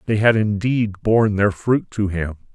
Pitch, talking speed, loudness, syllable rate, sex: 105 Hz, 190 wpm, -19 LUFS, 4.6 syllables/s, male